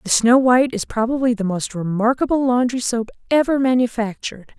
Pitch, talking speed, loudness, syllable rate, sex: 240 Hz, 155 wpm, -18 LUFS, 5.6 syllables/s, female